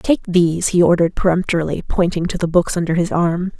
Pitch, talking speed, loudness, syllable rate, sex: 175 Hz, 200 wpm, -17 LUFS, 6.1 syllables/s, female